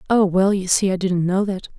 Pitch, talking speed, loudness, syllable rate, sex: 190 Hz, 270 wpm, -19 LUFS, 5.2 syllables/s, female